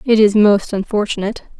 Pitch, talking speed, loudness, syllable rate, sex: 210 Hz, 150 wpm, -15 LUFS, 5.8 syllables/s, female